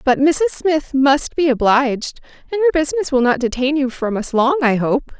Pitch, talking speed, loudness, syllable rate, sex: 275 Hz, 195 wpm, -17 LUFS, 5.3 syllables/s, female